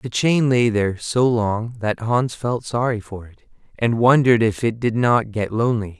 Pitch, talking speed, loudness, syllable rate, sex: 115 Hz, 200 wpm, -19 LUFS, 4.6 syllables/s, male